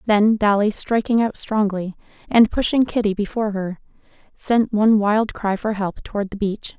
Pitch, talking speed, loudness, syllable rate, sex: 210 Hz, 170 wpm, -20 LUFS, 4.9 syllables/s, female